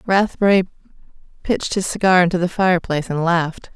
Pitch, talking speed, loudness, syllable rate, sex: 180 Hz, 145 wpm, -18 LUFS, 6.3 syllables/s, female